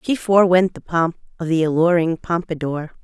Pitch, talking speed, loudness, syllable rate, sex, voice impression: 170 Hz, 160 wpm, -18 LUFS, 5.5 syllables/s, female, feminine, middle-aged, tensed, powerful, clear, intellectual, calm, friendly, elegant, lively, slightly strict, slightly sharp